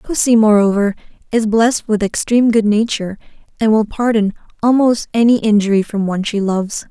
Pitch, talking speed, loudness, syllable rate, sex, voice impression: 215 Hz, 155 wpm, -15 LUFS, 5.8 syllables/s, female, very feminine, slightly young, thin, slightly tensed, slightly weak, slightly bright, slightly soft, clear, slightly fluent, cute, slightly intellectual, refreshing, sincere, very calm, very friendly, reassuring, slightly unique, elegant, slightly wild, sweet, slightly lively, kind, modest, light